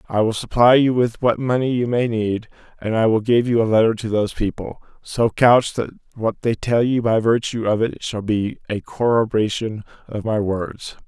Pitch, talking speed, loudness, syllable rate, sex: 115 Hz, 205 wpm, -19 LUFS, 5.1 syllables/s, male